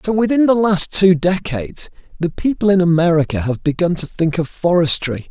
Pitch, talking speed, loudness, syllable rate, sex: 170 Hz, 180 wpm, -16 LUFS, 5.3 syllables/s, male